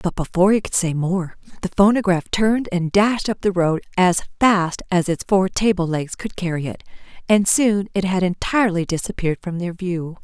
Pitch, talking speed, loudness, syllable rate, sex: 185 Hz, 195 wpm, -19 LUFS, 5.2 syllables/s, female